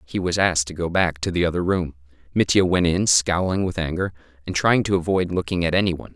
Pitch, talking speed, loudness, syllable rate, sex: 85 Hz, 235 wpm, -21 LUFS, 6.2 syllables/s, male